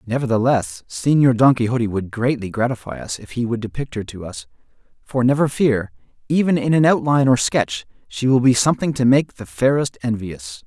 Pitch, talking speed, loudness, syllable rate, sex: 120 Hz, 185 wpm, -19 LUFS, 5.4 syllables/s, male